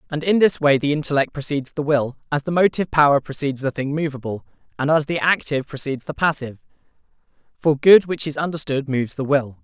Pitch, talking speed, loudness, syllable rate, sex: 145 Hz, 200 wpm, -20 LUFS, 6.6 syllables/s, male